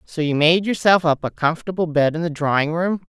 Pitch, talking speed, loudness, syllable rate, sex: 165 Hz, 230 wpm, -19 LUFS, 5.7 syllables/s, female